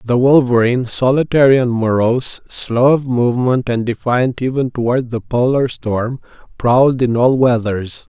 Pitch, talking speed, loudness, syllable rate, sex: 125 Hz, 140 wpm, -15 LUFS, 4.6 syllables/s, male